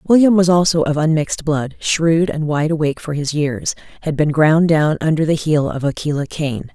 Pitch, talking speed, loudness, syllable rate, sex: 155 Hz, 195 wpm, -17 LUFS, 5.1 syllables/s, female